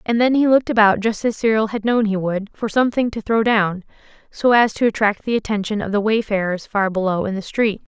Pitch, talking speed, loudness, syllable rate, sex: 215 Hz, 235 wpm, -18 LUFS, 5.8 syllables/s, female